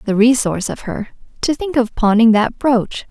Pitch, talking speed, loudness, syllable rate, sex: 235 Hz, 195 wpm, -16 LUFS, 4.9 syllables/s, female